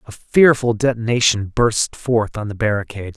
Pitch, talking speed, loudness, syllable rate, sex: 110 Hz, 150 wpm, -17 LUFS, 5.0 syllables/s, male